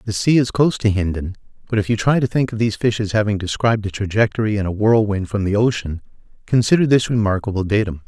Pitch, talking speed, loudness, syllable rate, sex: 105 Hz, 215 wpm, -18 LUFS, 6.6 syllables/s, male